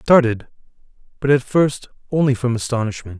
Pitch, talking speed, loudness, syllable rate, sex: 125 Hz, 150 wpm, -19 LUFS, 6.0 syllables/s, male